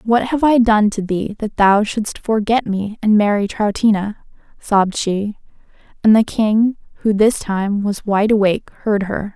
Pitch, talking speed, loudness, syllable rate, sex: 210 Hz, 175 wpm, -17 LUFS, 4.4 syllables/s, female